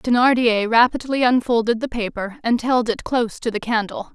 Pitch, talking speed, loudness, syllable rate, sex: 235 Hz, 175 wpm, -19 LUFS, 5.2 syllables/s, female